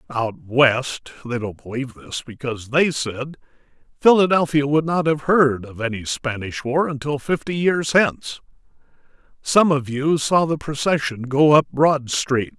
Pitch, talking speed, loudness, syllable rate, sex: 140 Hz, 155 wpm, -20 LUFS, 4.4 syllables/s, male